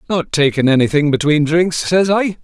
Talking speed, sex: 175 wpm, male